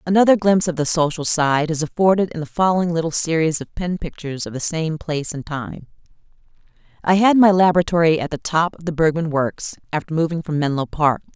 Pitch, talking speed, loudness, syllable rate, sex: 165 Hz, 200 wpm, -19 LUFS, 6.0 syllables/s, female